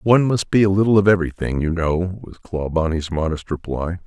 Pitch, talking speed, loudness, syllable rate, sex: 90 Hz, 190 wpm, -19 LUFS, 5.7 syllables/s, male